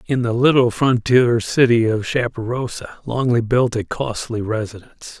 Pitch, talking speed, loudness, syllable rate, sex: 120 Hz, 140 wpm, -18 LUFS, 4.7 syllables/s, male